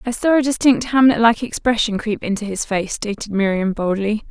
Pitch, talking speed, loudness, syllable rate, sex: 220 Hz, 195 wpm, -18 LUFS, 5.3 syllables/s, female